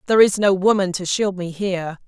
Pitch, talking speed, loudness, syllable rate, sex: 190 Hz, 230 wpm, -19 LUFS, 6.0 syllables/s, female